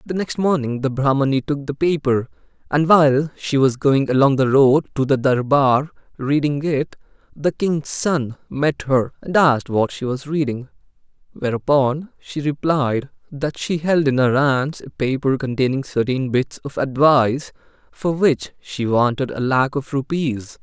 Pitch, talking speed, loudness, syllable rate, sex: 140 Hz, 165 wpm, -19 LUFS, 4.4 syllables/s, male